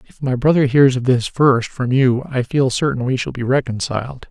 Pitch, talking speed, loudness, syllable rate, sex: 130 Hz, 225 wpm, -17 LUFS, 5.1 syllables/s, male